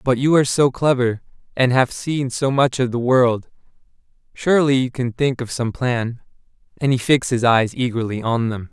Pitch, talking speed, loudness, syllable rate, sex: 125 Hz, 185 wpm, -19 LUFS, 5.1 syllables/s, male